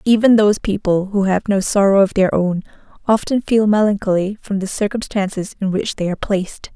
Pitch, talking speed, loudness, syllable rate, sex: 200 Hz, 185 wpm, -17 LUFS, 5.6 syllables/s, female